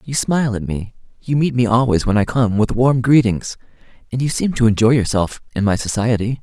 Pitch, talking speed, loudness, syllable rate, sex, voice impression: 115 Hz, 215 wpm, -17 LUFS, 5.6 syllables/s, male, masculine, adult-like, thin, slightly weak, bright, slightly cool, slightly intellectual, refreshing, sincere, friendly, unique, kind, modest